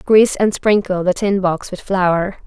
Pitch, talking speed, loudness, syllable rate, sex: 190 Hz, 195 wpm, -16 LUFS, 4.4 syllables/s, female